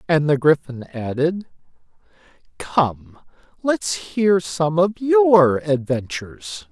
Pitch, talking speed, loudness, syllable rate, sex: 160 Hz, 100 wpm, -19 LUFS, 3.2 syllables/s, male